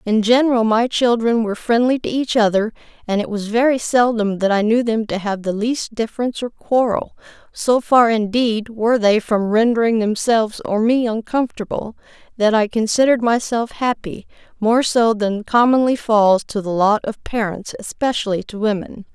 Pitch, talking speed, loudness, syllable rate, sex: 225 Hz, 165 wpm, -18 LUFS, 5.0 syllables/s, female